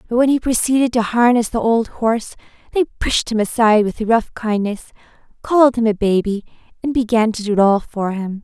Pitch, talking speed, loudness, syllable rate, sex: 225 Hz, 200 wpm, -17 LUFS, 5.5 syllables/s, female